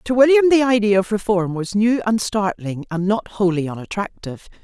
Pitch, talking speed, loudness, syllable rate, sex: 210 Hz, 180 wpm, -18 LUFS, 5.4 syllables/s, female